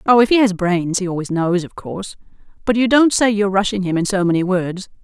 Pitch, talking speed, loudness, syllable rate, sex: 195 Hz, 250 wpm, -17 LUFS, 6.0 syllables/s, female